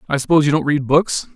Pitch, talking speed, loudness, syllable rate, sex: 145 Hz, 265 wpm, -16 LUFS, 7.0 syllables/s, male